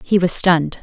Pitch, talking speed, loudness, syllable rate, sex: 170 Hz, 220 wpm, -15 LUFS, 5.5 syllables/s, female